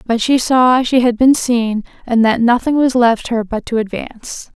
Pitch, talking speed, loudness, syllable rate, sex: 240 Hz, 210 wpm, -14 LUFS, 4.5 syllables/s, female